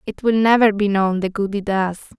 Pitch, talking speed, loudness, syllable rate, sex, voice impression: 205 Hz, 245 wpm, -18 LUFS, 5.4 syllables/s, female, feminine, slightly young, slightly weak, soft, slightly halting, calm, slightly friendly, kind, modest